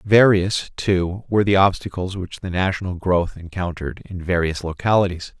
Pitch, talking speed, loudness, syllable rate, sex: 90 Hz, 145 wpm, -20 LUFS, 5.0 syllables/s, male